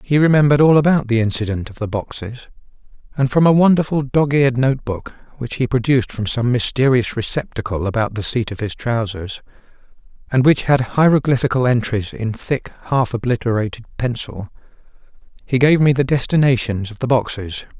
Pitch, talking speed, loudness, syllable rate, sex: 125 Hz, 160 wpm, -17 LUFS, 5.7 syllables/s, male